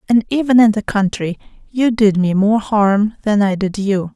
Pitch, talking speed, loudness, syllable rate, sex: 210 Hz, 200 wpm, -15 LUFS, 4.5 syllables/s, female